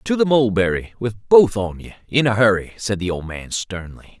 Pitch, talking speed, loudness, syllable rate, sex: 110 Hz, 215 wpm, -19 LUFS, 4.9 syllables/s, male